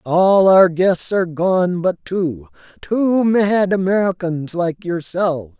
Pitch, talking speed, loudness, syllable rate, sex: 180 Hz, 120 wpm, -17 LUFS, 3.5 syllables/s, male